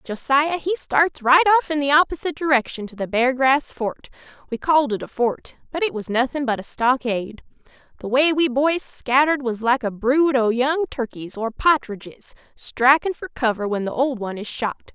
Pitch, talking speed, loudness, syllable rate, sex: 265 Hz, 190 wpm, -20 LUFS, 5.1 syllables/s, female